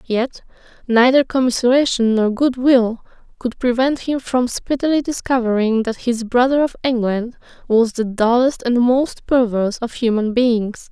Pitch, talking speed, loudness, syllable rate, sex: 240 Hz, 145 wpm, -17 LUFS, 4.5 syllables/s, female